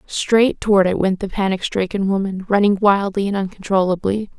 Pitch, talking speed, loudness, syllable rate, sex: 195 Hz, 165 wpm, -18 LUFS, 5.3 syllables/s, female